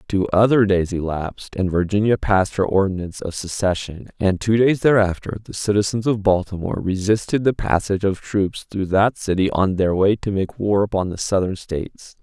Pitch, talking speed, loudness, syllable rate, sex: 100 Hz, 180 wpm, -20 LUFS, 5.4 syllables/s, male